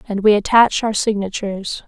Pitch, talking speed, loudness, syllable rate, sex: 210 Hz, 160 wpm, -17 LUFS, 5.3 syllables/s, female